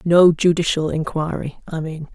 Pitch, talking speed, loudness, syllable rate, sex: 165 Hz, 140 wpm, -19 LUFS, 4.5 syllables/s, female